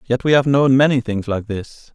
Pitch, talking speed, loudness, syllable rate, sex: 125 Hz, 245 wpm, -16 LUFS, 5.1 syllables/s, male